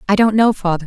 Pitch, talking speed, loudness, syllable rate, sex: 205 Hz, 280 wpm, -15 LUFS, 7.0 syllables/s, female